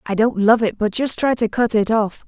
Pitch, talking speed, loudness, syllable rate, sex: 220 Hz, 290 wpm, -18 LUFS, 5.1 syllables/s, female